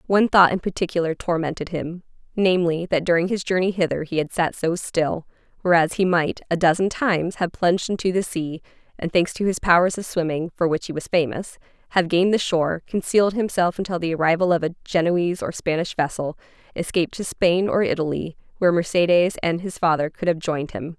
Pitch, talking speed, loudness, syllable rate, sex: 175 Hz, 195 wpm, -22 LUFS, 5.9 syllables/s, female